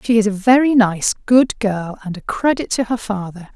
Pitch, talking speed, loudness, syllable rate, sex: 215 Hz, 220 wpm, -17 LUFS, 4.9 syllables/s, female